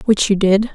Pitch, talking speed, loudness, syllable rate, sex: 205 Hz, 240 wpm, -15 LUFS, 4.9 syllables/s, female